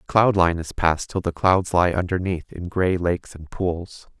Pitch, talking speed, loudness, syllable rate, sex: 90 Hz, 200 wpm, -22 LUFS, 4.5 syllables/s, male